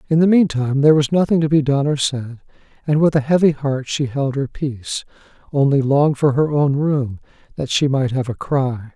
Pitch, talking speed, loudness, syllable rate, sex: 140 Hz, 215 wpm, -18 LUFS, 5.3 syllables/s, male